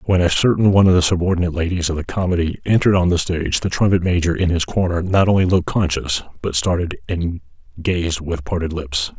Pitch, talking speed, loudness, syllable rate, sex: 85 Hz, 210 wpm, -18 LUFS, 6.3 syllables/s, male